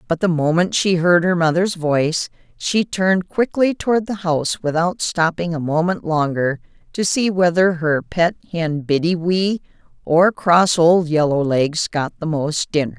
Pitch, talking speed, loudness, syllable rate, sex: 170 Hz, 165 wpm, -18 LUFS, 4.4 syllables/s, female